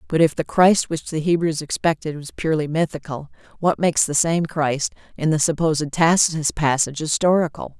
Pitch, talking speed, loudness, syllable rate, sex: 155 Hz, 170 wpm, -20 LUFS, 5.5 syllables/s, female